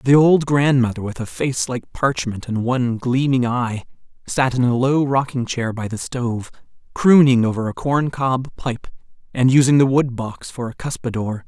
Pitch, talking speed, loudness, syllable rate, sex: 125 Hz, 185 wpm, -19 LUFS, 4.7 syllables/s, male